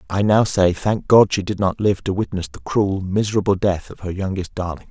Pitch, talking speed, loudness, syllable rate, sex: 95 Hz, 230 wpm, -19 LUFS, 5.3 syllables/s, male